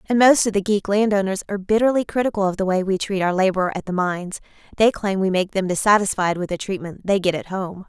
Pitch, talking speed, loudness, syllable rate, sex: 195 Hz, 245 wpm, -20 LUFS, 6.2 syllables/s, female